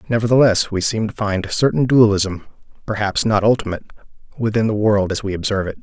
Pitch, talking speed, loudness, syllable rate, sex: 105 Hz, 185 wpm, -18 LUFS, 6.6 syllables/s, male